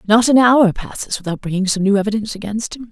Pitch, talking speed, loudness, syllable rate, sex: 215 Hz, 225 wpm, -16 LUFS, 6.6 syllables/s, female